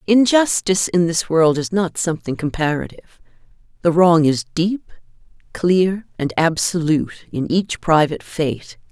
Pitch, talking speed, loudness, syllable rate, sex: 165 Hz, 130 wpm, -18 LUFS, 4.6 syllables/s, female